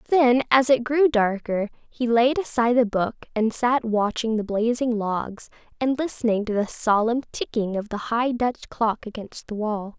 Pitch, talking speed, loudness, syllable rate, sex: 230 Hz, 180 wpm, -23 LUFS, 4.5 syllables/s, female